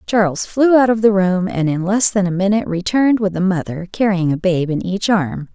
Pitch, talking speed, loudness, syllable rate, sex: 195 Hz, 240 wpm, -16 LUFS, 5.4 syllables/s, female